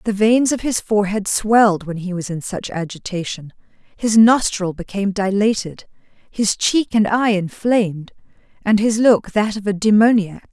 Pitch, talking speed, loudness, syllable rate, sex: 205 Hz, 155 wpm, -17 LUFS, 4.8 syllables/s, female